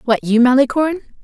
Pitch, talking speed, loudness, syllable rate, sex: 260 Hz, 145 wpm, -15 LUFS, 6.7 syllables/s, female